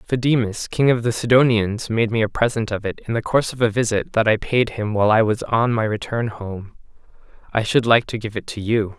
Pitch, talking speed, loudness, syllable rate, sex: 110 Hz, 240 wpm, -20 LUFS, 5.5 syllables/s, male